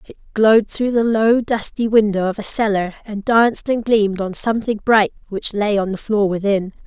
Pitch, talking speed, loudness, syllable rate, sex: 210 Hz, 200 wpm, -17 LUFS, 5.2 syllables/s, female